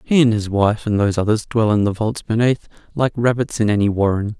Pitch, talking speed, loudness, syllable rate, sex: 110 Hz, 230 wpm, -18 LUFS, 5.7 syllables/s, male